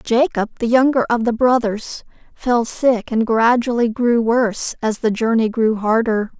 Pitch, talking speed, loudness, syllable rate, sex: 230 Hz, 160 wpm, -17 LUFS, 4.3 syllables/s, female